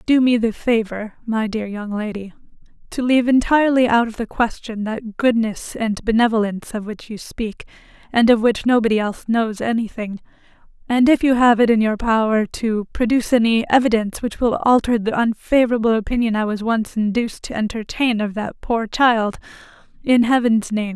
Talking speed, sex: 190 wpm, female